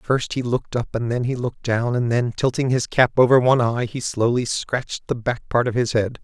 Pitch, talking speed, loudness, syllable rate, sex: 120 Hz, 250 wpm, -21 LUFS, 5.5 syllables/s, male